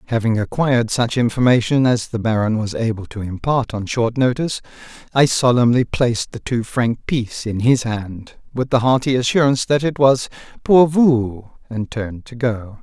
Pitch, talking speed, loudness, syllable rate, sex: 120 Hz, 175 wpm, -18 LUFS, 5.0 syllables/s, male